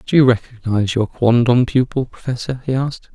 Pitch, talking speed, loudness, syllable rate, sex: 120 Hz, 170 wpm, -17 LUFS, 5.8 syllables/s, male